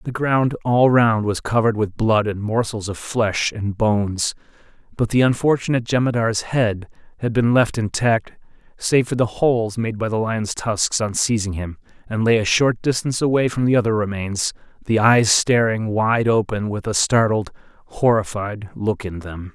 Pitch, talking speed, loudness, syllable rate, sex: 110 Hz, 175 wpm, -19 LUFS, 4.8 syllables/s, male